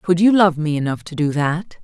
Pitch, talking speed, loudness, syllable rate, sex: 165 Hz, 260 wpm, -18 LUFS, 5.2 syllables/s, female